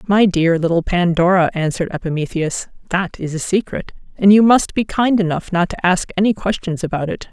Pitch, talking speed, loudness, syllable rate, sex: 180 Hz, 190 wpm, -17 LUFS, 5.5 syllables/s, female